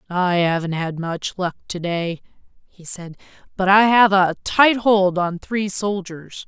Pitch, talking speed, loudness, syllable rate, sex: 185 Hz, 165 wpm, -19 LUFS, 3.8 syllables/s, female